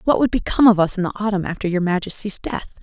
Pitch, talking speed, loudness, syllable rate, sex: 200 Hz, 255 wpm, -19 LUFS, 6.9 syllables/s, female